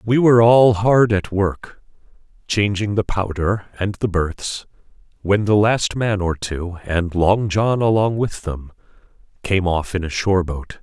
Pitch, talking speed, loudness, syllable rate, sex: 100 Hz, 165 wpm, -18 LUFS, 4.1 syllables/s, male